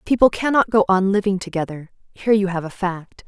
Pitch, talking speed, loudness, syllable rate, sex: 195 Hz, 185 wpm, -19 LUFS, 5.8 syllables/s, female